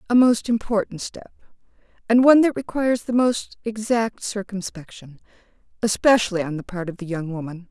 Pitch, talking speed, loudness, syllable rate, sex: 210 Hz, 150 wpm, -21 LUFS, 5.5 syllables/s, female